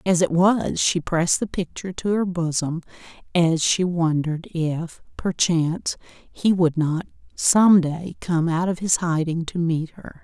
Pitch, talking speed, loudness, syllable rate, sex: 170 Hz, 165 wpm, -21 LUFS, 4.1 syllables/s, female